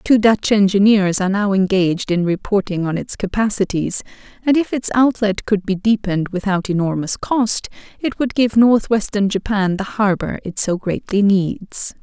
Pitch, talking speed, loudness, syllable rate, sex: 205 Hz, 160 wpm, -17 LUFS, 4.8 syllables/s, female